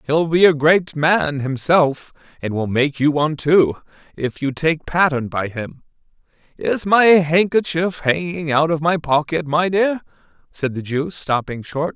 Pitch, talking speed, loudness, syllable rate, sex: 155 Hz, 160 wpm, -18 LUFS, 4.2 syllables/s, male